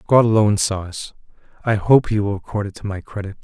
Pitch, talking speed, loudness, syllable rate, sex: 105 Hz, 225 wpm, -19 LUFS, 6.3 syllables/s, male